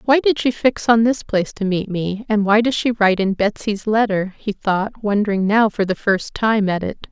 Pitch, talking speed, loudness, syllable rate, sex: 210 Hz, 235 wpm, -18 LUFS, 5.0 syllables/s, female